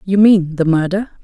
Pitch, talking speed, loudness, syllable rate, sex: 185 Hz, 145 wpm, -14 LUFS, 4.5 syllables/s, female